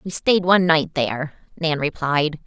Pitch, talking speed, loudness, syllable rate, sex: 160 Hz, 170 wpm, -20 LUFS, 4.6 syllables/s, female